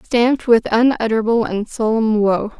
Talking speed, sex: 140 wpm, female